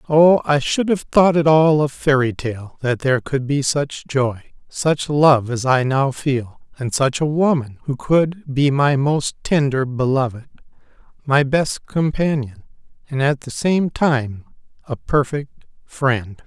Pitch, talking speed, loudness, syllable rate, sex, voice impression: 140 Hz, 160 wpm, -18 LUFS, 3.9 syllables/s, male, very masculine, middle-aged, slightly thick, slightly muffled, sincere, friendly, slightly kind